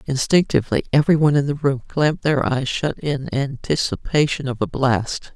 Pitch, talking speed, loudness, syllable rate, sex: 140 Hz, 155 wpm, -20 LUFS, 5.2 syllables/s, female